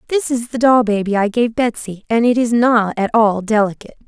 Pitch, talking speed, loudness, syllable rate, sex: 225 Hz, 220 wpm, -16 LUFS, 5.4 syllables/s, female